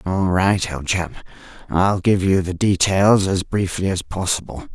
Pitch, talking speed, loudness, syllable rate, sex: 95 Hz, 165 wpm, -19 LUFS, 4.2 syllables/s, female